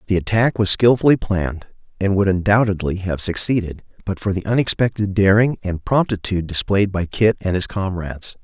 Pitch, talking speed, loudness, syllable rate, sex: 100 Hz, 165 wpm, -18 LUFS, 5.5 syllables/s, male